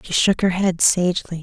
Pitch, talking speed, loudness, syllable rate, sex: 180 Hz, 210 wpm, -18 LUFS, 5.3 syllables/s, female